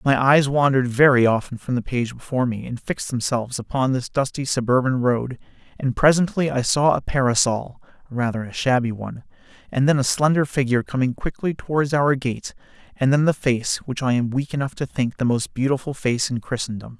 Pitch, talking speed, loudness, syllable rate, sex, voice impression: 130 Hz, 195 wpm, -21 LUFS, 5.6 syllables/s, male, masculine, slightly adult-like, fluent, slightly cool, refreshing, slightly friendly